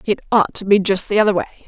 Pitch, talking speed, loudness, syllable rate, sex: 200 Hz, 285 wpm, -17 LUFS, 7.2 syllables/s, female